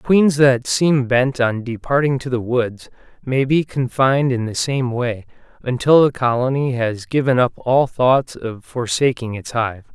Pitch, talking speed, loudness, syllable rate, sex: 125 Hz, 170 wpm, -18 LUFS, 4.2 syllables/s, male